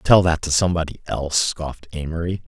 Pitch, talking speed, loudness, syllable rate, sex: 80 Hz, 165 wpm, -21 LUFS, 6.1 syllables/s, male